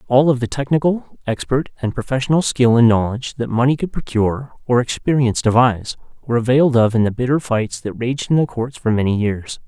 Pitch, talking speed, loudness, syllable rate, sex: 125 Hz, 200 wpm, -18 LUFS, 6.0 syllables/s, male